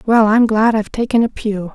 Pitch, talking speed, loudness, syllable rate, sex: 220 Hz, 240 wpm, -15 LUFS, 5.6 syllables/s, female